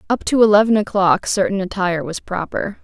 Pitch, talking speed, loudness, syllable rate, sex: 195 Hz, 170 wpm, -17 LUFS, 5.7 syllables/s, female